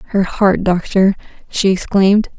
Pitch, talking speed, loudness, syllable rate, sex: 195 Hz, 125 wpm, -15 LUFS, 4.7 syllables/s, female